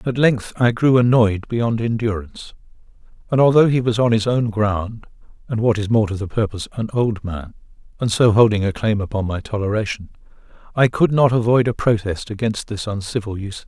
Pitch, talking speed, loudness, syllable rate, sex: 110 Hz, 190 wpm, -19 LUFS, 5.6 syllables/s, male